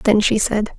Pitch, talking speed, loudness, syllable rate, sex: 210 Hz, 230 wpm, -17 LUFS, 4.0 syllables/s, female